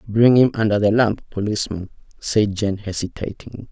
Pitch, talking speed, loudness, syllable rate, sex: 105 Hz, 145 wpm, -19 LUFS, 5.0 syllables/s, male